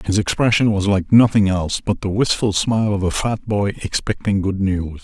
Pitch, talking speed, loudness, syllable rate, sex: 100 Hz, 200 wpm, -18 LUFS, 5.2 syllables/s, male